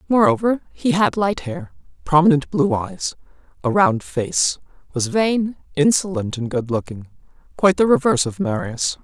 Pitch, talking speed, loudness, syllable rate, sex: 205 Hz, 145 wpm, -19 LUFS, 4.8 syllables/s, female